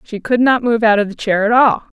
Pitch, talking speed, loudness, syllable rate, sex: 225 Hz, 300 wpm, -14 LUFS, 5.5 syllables/s, female